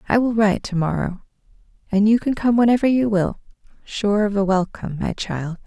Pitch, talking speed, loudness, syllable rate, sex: 205 Hz, 190 wpm, -20 LUFS, 5.6 syllables/s, female